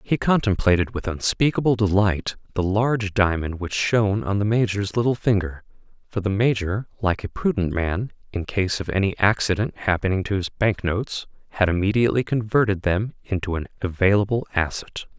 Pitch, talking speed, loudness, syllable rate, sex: 100 Hz, 160 wpm, -22 LUFS, 5.3 syllables/s, male